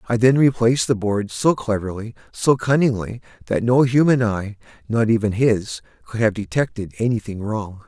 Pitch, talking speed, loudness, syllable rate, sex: 110 Hz, 150 wpm, -20 LUFS, 4.9 syllables/s, male